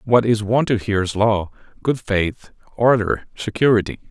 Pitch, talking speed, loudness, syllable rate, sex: 110 Hz, 145 wpm, -19 LUFS, 4.9 syllables/s, male